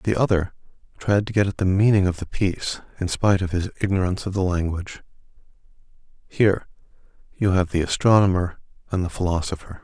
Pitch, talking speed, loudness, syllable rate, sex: 95 Hz, 165 wpm, -22 LUFS, 6.3 syllables/s, male